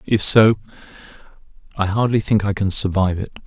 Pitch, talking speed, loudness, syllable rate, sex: 100 Hz, 155 wpm, -18 LUFS, 5.9 syllables/s, male